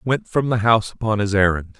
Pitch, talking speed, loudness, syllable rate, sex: 110 Hz, 270 wpm, -19 LUFS, 6.6 syllables/s, male